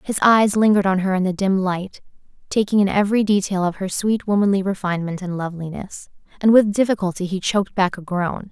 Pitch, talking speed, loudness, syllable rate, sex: 195 Hz, 195 wpm, -19 LUFS, 6.0 syllables/s, female